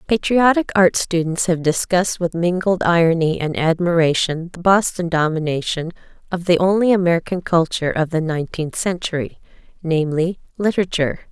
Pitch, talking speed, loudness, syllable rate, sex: 175 Hz, 125 wpm, -18 LUFS, 5.5 syllables/s, female